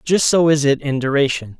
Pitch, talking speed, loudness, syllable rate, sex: 145 Hz, 225 wpm, -16 LUFS, 5.4 syllables/s, male